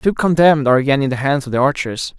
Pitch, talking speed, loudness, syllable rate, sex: 140 Hz, 300 wpm, -15 LUFS, 7.5 syllables/s, male